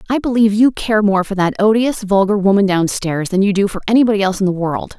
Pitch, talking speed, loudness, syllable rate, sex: 200 Hz, 255 wpm, -15 LUFS, 6.4 syllables/s, female